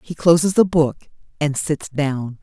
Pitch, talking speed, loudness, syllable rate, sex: 155 Hz, 175 wpm, -19 LUFS, 3.9 syllables/s, female